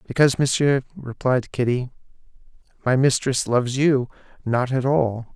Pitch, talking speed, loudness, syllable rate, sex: 130 Hz, 125 wpm, -21 LUFS, 4.8 syllables/s, male